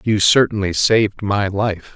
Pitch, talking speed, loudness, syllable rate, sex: 100 Hz, 155 wpm, -16 LUFS, 4.3 syllables/s, male